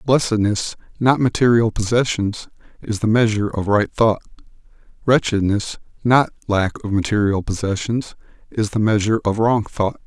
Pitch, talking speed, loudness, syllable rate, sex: 110 Hz, 130 wpm, -19 LUFS, 5.0 syllables/s, male